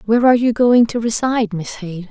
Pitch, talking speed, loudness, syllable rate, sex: 225 Hz, 230 wpm, -16 LUFS, 6.3 syllables/s, female